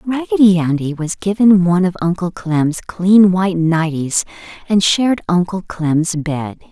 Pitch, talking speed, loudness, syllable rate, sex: 180 Hz, 145 wpm, -15 LUFS, 4.4 syllables/s, female